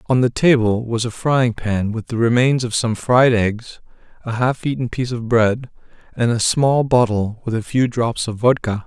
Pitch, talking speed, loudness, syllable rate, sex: 120 Hz, 205 wpm, -18 LUFS, 4.6 syllables/s, male